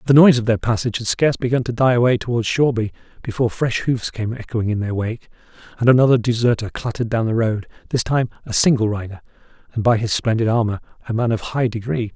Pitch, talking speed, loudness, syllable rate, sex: 115 Hz, 210 wpm, -19 LUFS, 6.6 syllables/s, male